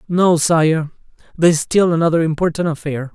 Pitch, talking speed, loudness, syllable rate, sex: 165 Hz, 150 wpm, -16 LUFS, 5.5 syllables/s, male